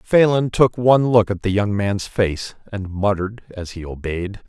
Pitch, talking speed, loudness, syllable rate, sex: 105 Hz, 190 wpm, -19 LUFS, 4.6 syllables/s, male